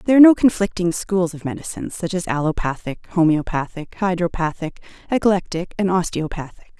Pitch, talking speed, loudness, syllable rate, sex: 180 Hz, 135 wpm, -20 LUFS, 5.9 syllables/s, female